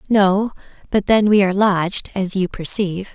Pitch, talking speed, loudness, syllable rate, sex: 195 Hz, 170 wpm, -18 LUFS, 5.1 syllables/s, female